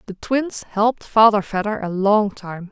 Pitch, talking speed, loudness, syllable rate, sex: 205 Hz, 175 wpm, -19 LUFS, 4.4 syllables/s, female